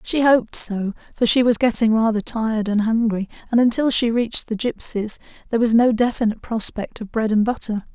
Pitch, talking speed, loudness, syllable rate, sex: 225 Hz, 195 wpm, -19 LUFS, 5.7 syllables/s, female